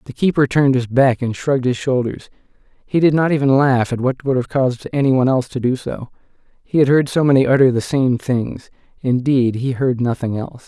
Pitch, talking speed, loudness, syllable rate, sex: 130 Hz, 215 wpm, -17 LUFS, 5.8 syllables/s, male